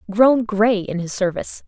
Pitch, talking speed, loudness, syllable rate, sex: 210 Hz, 180 wpm, -19 LUFS, 4.8 syllables/s, female